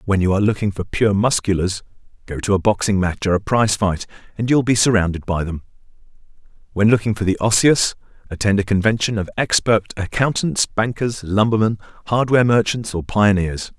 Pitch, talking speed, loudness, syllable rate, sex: 105 Hz, 175 wpm, -18 LUFS, 5.8 syllables/s, male